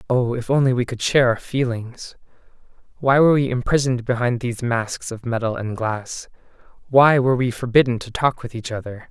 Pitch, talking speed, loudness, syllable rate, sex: 125 Hz, 185 wpm, -20 LUFS, 5.6 syllables/s, male